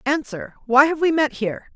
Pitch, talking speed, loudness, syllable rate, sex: 280 Hz, 205 wpm, -19 LUFS, 5.2 syllables/s, female